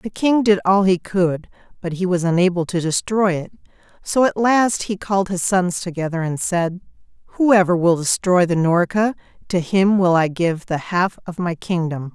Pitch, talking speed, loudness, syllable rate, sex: 180 Hz, 190 wpm, -18 LUFS, 4.6 syllables/s, female